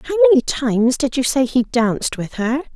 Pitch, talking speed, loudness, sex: 265 Hz, 220 wpm, -17 LUFS, female